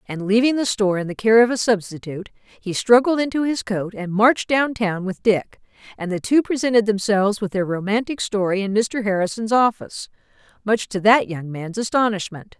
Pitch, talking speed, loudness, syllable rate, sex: 210 Hz, 190 wpm, -20 LUFS, 5.4 syllables/s, female